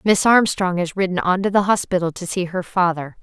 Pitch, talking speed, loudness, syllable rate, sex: 185 Hz, 225 wpm, -19 LUFS, 5.5 syllables/s, female